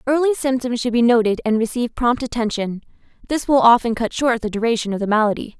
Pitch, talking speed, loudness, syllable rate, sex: 235 Hz, 205 wpm, -19 LUFS, 6.3 syllables/s, female